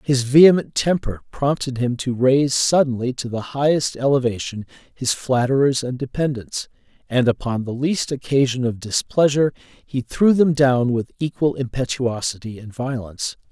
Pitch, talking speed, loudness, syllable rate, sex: 130 Hz, 140 wpm, -20 LUFS, 4.9 syllables/s, male